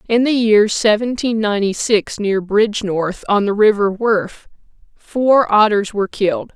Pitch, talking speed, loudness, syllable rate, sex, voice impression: 210 Hz, 145 wpm, -16 LUFS, 5.2 syllables/s, female, feminine, adult-like, tensed, powerful, clear, intellectual, calm, reassuring, elegant, lively, slightly intense